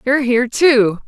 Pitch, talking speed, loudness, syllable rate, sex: 250 Hz, 170 wpm, -14 LUFS, 5.4 syllables/s, female